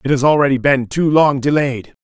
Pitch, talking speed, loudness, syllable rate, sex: 140 Hz, 205 wpm, -15 LUFS, 5.4 syllables/s, male